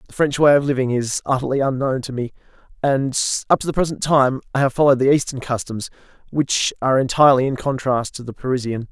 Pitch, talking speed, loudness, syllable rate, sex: 130 Hz, 200 wpm, -19 LUFS, 6.1 syllables/s, male